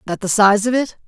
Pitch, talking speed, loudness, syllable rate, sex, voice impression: 215 Hz, 280 wpm, -16 LUFS, 5.8 syllables/s, female, very feminine, adult-like, slightly clear, slightly intellectual, slightly strict